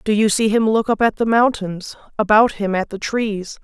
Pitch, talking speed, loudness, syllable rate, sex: 215 Hz, 230 wpm, -18 LUFS, 4.8 syllables/s, female